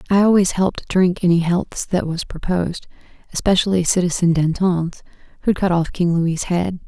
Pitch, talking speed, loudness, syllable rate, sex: 175 Hz, 150 wpm, -19 LUFS, 4.9 syllables/s, female